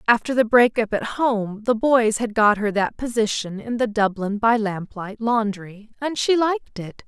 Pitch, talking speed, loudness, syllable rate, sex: 225 Hz, 185 wpm, -21 LUFS, 4.5 syllables/s, female